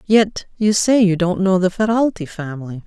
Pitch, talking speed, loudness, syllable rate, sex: 195 Hz, 190 wpm, -17 LUFS, 4.8 syllables/s, female